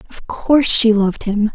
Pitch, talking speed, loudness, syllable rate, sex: 225 Hz, 195 wpm, -15 LUFS, 5.2 syllables/s, female